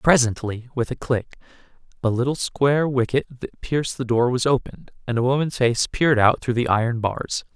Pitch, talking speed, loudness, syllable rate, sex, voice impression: 125 Hz, 190 wpm, -22 LUFS, 5.3 syllables/s, male, masculine, adult-like, tensed, powerful, bright, clear, cool, intellectual, friendly, reassuring, slightly lively, kind